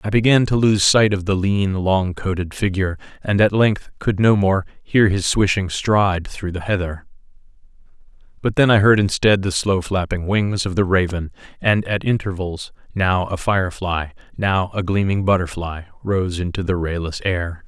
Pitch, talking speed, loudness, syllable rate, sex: 95 Hz, 175 wpm, -19 LUFS, 4.8 syllables/s, male